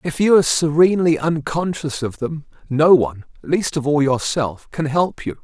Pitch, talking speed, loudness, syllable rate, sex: 150 Hz, 155 wpm, -18 LUFS, 4.9 syllables/s, male